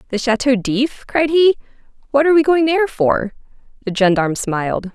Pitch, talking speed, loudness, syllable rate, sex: 250 Hz, 170 wpm, -16 LUFS, 5.6 syllables/s, female